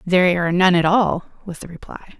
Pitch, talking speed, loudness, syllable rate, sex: 180 Hz, 220 wpm, -17 LUFS, 6.0 syllables/s, female